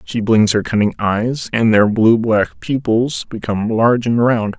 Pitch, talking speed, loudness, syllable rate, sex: 110 Hz, 185 wpm, -15 LUFS, 4.4 syllables/s, male